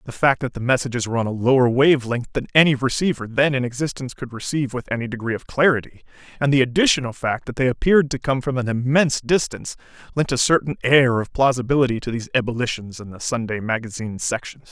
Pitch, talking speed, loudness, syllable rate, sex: 130 Hz, 210 wpm, -20 LUFS, 6.7 syllables/s, male